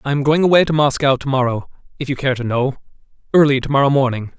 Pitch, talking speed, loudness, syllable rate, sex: 135 Hz, 220 wpm, -16 LUFS, 6.7 syllables/s, male